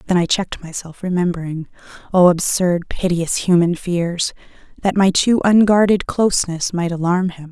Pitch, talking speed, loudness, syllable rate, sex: 180 Hz, 130 wpm, -17 LUFS, 4.9 syllables/s, female